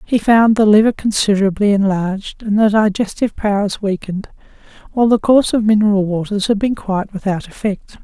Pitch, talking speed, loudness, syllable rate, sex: 205 Hz, 165 wpm, -15 LUFS, 5.9 syllables/s, female